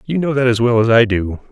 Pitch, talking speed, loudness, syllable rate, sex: 120 Hz, 320 wpm, -15 LUFS, 6.0 syllables/s, male